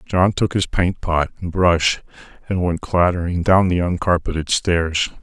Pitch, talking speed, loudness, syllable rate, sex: 85 Hz, 160 wpm, -19 LUFS, 4.3 syllables/s, male